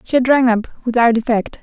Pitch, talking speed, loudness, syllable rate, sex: 240 Hz, 220 wpm, -15 LUFS, 5.7 syllables/s, female